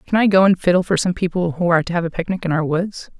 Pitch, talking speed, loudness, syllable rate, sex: 175 Hz, 320 wpm, -18 LUFS, 7.0 syllables/s, female